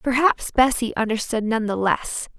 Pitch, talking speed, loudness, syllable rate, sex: 235 Hz, 150 wpm, -21 LUFS, 4.5 syllables/s, female